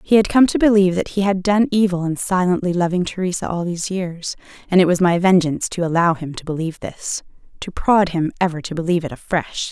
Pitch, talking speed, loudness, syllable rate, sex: 180 Hz, 220 wpm, -19 LUFS, 6.2 syllables/s, female